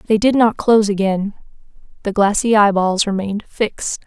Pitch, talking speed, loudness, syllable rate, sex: 205 Hz, 145 wpm, -16 LUFS, 5.1 syllables/s, female